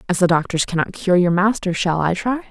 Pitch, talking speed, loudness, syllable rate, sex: 185 Hz, 240 wpm, -18 LUFS, 5.7 syllables/s, female